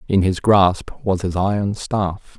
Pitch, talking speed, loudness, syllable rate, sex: 95 Hz, 175 wpm, -19 LUFS, 3.8 syllables/s, male